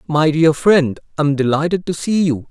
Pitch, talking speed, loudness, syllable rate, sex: 155 Hz, 215 wpm, -16 LUFS, 5.1 syllables/s, male